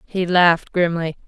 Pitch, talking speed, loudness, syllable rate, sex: 170 Hz, 140 wpm, -18 LUFS, 4.6 syllables/s, female